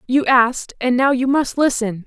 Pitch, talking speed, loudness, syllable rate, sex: 255 Hz, 175 wpm, -17 LUFS, 4.8 syllables/s, female